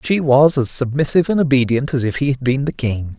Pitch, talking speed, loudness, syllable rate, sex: 135 Hz, 245 wpm, -17 LUFS, 5.8 syllables/s, male